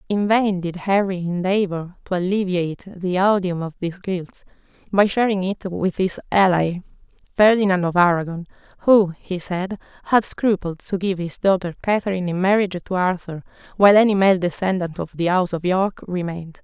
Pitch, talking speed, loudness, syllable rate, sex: 185 Hz, 160 wpm, -20 LUFS, 5.3 syllables/s, female